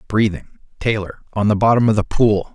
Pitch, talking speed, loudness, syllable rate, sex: 105 Hz, 190 wpm, -18 LUFS, 5.6 syllables/s, male